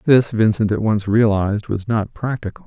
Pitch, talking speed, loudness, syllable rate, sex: 110 Hz, 180 wpm, -18 LUFS, 5.1 syllables/s, male